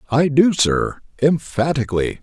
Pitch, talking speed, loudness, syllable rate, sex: 140 Hz, 110 wpm, -18 LUFS, 4.4 syllables/s, male